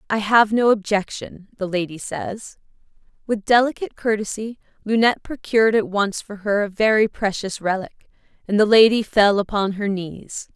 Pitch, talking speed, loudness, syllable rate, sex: 210 Hz, 155 wpm, -20 LUFS, 5.0 syllables/s, female